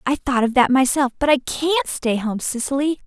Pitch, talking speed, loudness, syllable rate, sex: 270 Hz, 195 wpm, -19 LUFS, 4.9 syllables/s, female